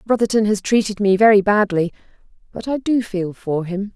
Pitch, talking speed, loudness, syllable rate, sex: 205 Hz, 180 wpm, -18 LUFS, 5.3 syllables/s, female